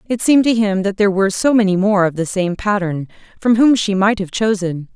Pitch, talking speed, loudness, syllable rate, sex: 200 Hz, 240 wpm, -16 LUFS, 5.8 syllables/s, female